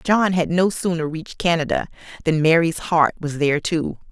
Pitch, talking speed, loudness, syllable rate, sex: 165 Hz, 175 wpm, -20 LUFS, 5.2 syllables/s, female